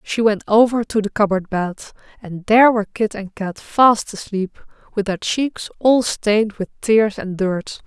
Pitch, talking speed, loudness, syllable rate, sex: 210 Hz, 185 wpm, -18 LUFS, 4.4 syllables/s, female